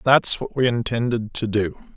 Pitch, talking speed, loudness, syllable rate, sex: 115 Hz, 185 wpm, -22 LUFS, 4.7 syllables/s, male